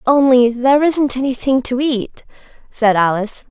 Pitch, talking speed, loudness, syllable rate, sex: 250 Hz, 135 wpm, -15 LUFS, 4.9 syllables/s, female